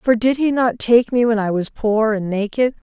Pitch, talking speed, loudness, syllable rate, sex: 225 Hz, 245 wpm, -18 LUFS, 4.9 syllables/s, female